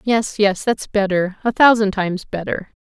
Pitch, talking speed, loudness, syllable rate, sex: 200 Hz, 170 wpm, -18 LUFS, 4.6 syllables/s, female